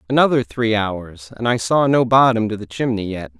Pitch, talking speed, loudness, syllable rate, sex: 115 Hz, 210 wpm, -18 LUFS, 5.1 syllables/s, male